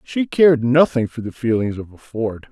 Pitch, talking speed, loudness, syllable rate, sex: 125 Hz, 215 wpm, -18 LUFS, 5.0 syllables/s, male